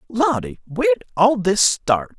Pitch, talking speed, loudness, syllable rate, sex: 165 Hz, 140 wpm, -18 LUFS, 4.1 syllables/s, male